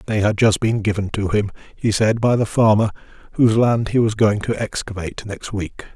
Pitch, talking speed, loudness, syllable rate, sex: 105 Hz, 210 wpm, -19 LUFS, 5.4 syllables/s, male